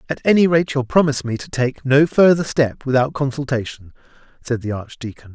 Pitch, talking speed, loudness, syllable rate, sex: 135 Hz, 180 wpm, -18 LUFS, 5.5 syllables/s, male